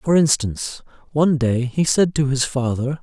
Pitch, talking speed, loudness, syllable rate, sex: 135 Hz, 180 wpm, -19 LUFS, 4.9 syllables/s, male